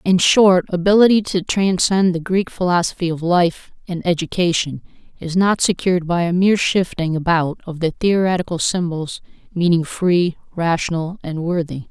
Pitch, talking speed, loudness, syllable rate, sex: 175 Hz, 145 wpm, -18 LUFS, 4.9 syllables/s, female